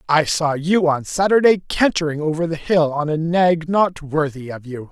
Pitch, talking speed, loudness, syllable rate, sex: 160 Hz, 195 wpm, -18 LUFS, 4.7 syllables/s, male